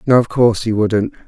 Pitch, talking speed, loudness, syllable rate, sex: 110 Hz, 235 wpm, -15 LUFS, 5.9 syllables/s, male